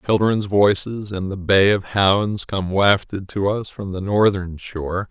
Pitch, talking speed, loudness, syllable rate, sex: 100 Hz, 175 wpm, -19 LUFS, 4.0 syllables/s, male